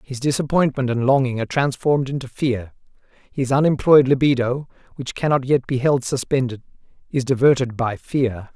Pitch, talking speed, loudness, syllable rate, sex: 130 Hz, 145 wpm, -20 LUFS, 5.3 syllables/s, male